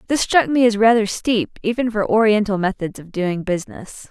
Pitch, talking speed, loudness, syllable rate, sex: 215 Hz, 190 wpm, -18 LUFS, 5.2 syllables/s, female